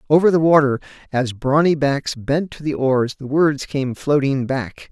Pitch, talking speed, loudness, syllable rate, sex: 140 Hz, 185 wpm, -19 LUFS, 4.4 syllables/s, male